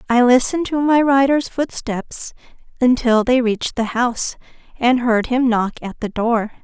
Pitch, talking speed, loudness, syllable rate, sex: 245 Hz, 165 wpm, -18 LUFS, 4.7 syllables/s, female